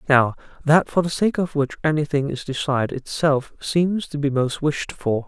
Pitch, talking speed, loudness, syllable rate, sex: 145 Hz, 195 wpm, -21 LUFS, 4.8 syllables/s, male